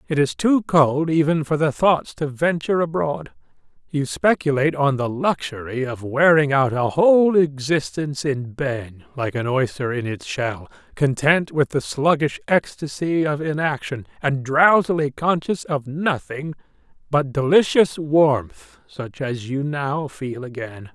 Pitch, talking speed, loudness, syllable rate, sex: 145 Hz, 145 wpm, -20 LUFS, 4.2 syllables/s, male